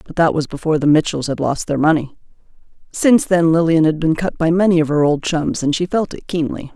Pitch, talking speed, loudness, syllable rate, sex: 160 Hz, 240 wpm, -16 LUFS, 5.9 syllables/s, female